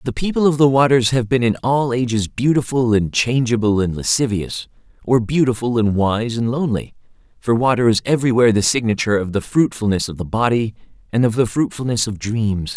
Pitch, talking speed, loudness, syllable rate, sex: 120 Hz, 185 wpm, -18 LUFS, 5.7 syllables/s, male